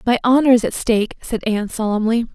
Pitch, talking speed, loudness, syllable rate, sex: 230 Hz, 205 wpm, -18 LUFS, 6.4 syllables/s, female